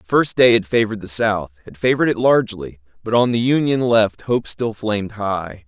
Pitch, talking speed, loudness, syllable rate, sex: 110 Hz, 210 wpm, -18 LUFS, 5.2 syllables/s, male